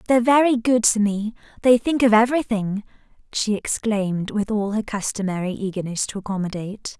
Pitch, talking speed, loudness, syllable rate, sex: 215 Hz, 145 wpm, -21 LUFS, 5.6 syllables/s, female